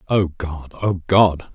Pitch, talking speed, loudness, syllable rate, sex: 90 Hz, 155 wpm, -19 LUFS, 3.2 syllables/s, male